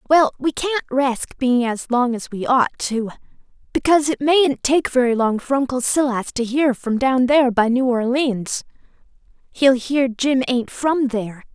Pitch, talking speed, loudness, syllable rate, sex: 260 Hz, 175 wpm, -19 LUFS, 4.4 syllables/s, female